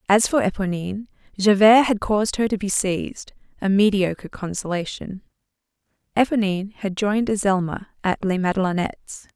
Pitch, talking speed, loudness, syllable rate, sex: 200 Hz, 130 wpm, -21 LUFS, 5.8 syllables/s, female